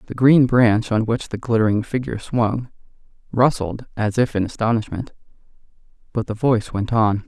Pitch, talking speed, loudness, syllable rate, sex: 115 Hz, 155 wpm, -20 LUFS, 5.1 syllables/s, male